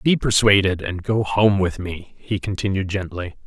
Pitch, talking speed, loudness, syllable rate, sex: 100 Hz, 175 wpm, -20 LUFS, 4.5 syllables/s, male